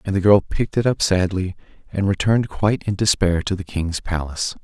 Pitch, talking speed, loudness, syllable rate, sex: 95 Hz, 205 wpm, -20 LUFS, 5.8 syllables/s, male